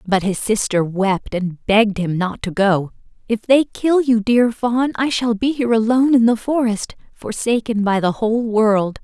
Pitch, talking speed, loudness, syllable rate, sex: 220 Hz, 195 wpm, -17 LUFS, 4.6 syllables/s, female